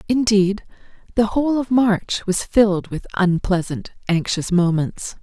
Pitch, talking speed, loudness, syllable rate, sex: 200 Hz, 125 wpm, -19 LUFS, 4.2 syllables/s, female